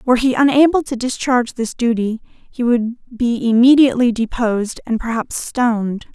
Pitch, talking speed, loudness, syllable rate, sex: 240 Hz, 145 wpm, -16 LUFS, 5.1 syllables/s, female